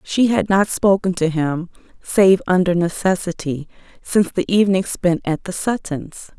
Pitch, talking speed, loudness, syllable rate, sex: 180 Hz, 150 wpm, -18 LUFS, 4.6 syllables/s, female